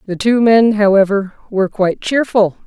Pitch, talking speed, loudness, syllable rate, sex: 210 Hz, 160 wpm, -14 LUFS, 5.3 syllables/s, female